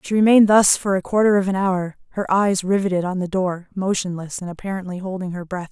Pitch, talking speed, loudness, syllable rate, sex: 190 Hz, 220 wpm, -20 LUFS, 6.0 syllables/s, female